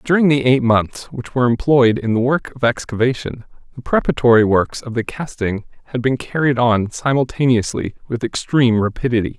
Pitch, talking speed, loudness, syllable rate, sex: 125 Hz, 165 wpm, -17 LUFS, 5.5 syllables/s, male